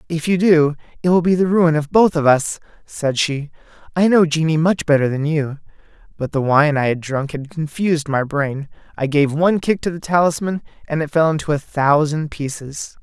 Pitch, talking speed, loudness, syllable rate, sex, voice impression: 155 Hz, 205 wpm, -18 LUFS, 5.1 syllables/s, male, masculine, slightly young, slightly adult-like, slightly thick, tensed, slightly weak, very bright, slightly soft, very clear, fluent, slightly cool, intellectual, very refreshing, sincere, calm, very friendly, reassuring, slightly unique, wild, slightly sweet, very lively, kind